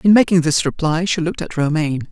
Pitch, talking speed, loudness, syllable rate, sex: 165 Hz, 225 wpm, -17 LUFS, 6.6 syllables/s, male